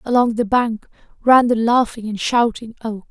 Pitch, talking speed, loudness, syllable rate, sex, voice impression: 230 Hz, 175 wpm, -17 LUFS, 4.6 syllables/s, female, slightly masculine, very young, slightly soft, slightly cute, friendly, slightly kind